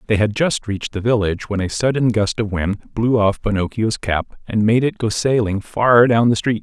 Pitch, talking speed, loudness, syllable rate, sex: 110 Hz, 225 wpm, -18 LUFS, 5.1 syllables/s, male